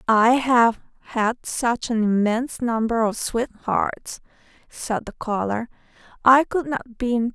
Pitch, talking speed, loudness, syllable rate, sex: 235 Hz, 145 wpm, -21 LUFS, 4.2 syllables/s, female